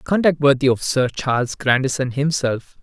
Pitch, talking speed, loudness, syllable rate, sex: 140 Hz, 150 wpm, -19 LUFS, 4.8 syllables/s, male